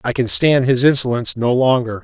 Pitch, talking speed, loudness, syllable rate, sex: 125 Hz, 205 wpm, -15 LUFS, 5.7 syllables/s, male